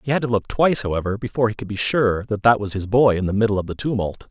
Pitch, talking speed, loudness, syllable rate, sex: 110 Hz, 305 wpm, -20 LUFS, 7.0 syllables/s, male